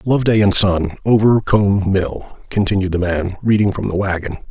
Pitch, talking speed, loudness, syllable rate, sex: 100 Hz, 160 wpm, -16 LUFS, 5.3 syllables/s, male